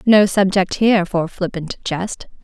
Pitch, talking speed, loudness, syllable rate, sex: 190 Hz, 150 wpm, -18 LUFS, 4.2 syllables/s, female